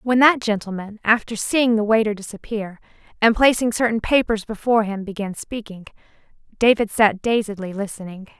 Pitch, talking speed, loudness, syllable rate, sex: 215 Hz, 145 wpm, -20 LUFS, 5.4 syllables/s, female